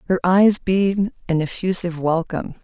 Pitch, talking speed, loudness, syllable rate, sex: 180 Hz, 135 wpm, -19 LUFS, 5.6 syllables/s, female